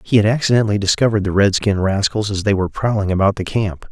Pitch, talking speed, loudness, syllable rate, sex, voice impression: 100 Hz, 230 wpm, -17 LUFS, 6.8 syllables/s, male, masculine, adult-like, tensed, clear, fluent, cool, intellectual, calm, kind, modest